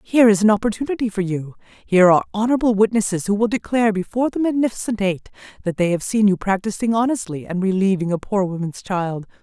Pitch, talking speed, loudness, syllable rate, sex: 205 Hz, 190 wpm, -19 LUFS, 6.5 syllables/s, female